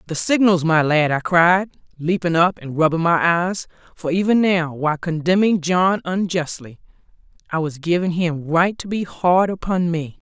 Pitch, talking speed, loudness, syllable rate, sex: 170 Hz, 170 wpm, -19 LUFS, 4.5 syllables/s, female